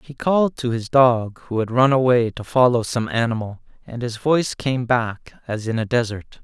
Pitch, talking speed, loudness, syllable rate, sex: 120 Hz, 205 wpm, -20 LUFS, 4.9 syllables/s, male